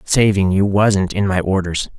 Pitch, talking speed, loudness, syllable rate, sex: 95 Hz, 180 wpm, -16 LUFS, 4.4 syllables/s, male